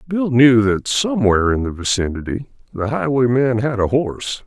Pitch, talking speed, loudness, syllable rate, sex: 120 Hz, 160 wpm, -17 LUFS, 5.1 syllables/s, male